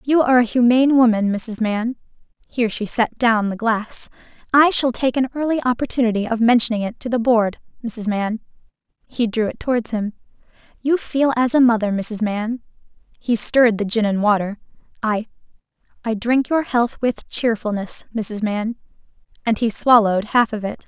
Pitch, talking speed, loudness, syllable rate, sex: 230 Hz, 170 wpm, -19 LUFS, 4.4 syllables/s, female